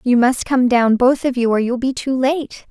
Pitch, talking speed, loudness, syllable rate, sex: 250 Hz, 265 wpm, -16 LUFS, 4.6 syllables/s, female